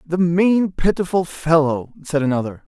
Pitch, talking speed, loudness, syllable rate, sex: 165 Hz, 130 wpm, -19 LUFS, 4.5 syllables/s, male